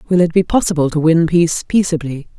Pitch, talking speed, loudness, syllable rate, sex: 165 Hz, 200 wpm, -15 LUFS, 6.2 syllables/s, female